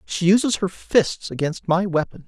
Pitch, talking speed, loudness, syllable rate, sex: 180 Hz, 185 wpm, -21 LUFS, 4.7 syllables/s, male